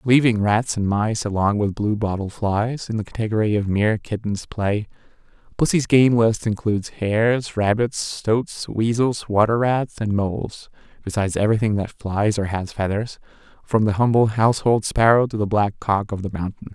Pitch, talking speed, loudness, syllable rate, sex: 110 Hz, 170 wpm, -21 LUFS, 4.9 syllables/s, male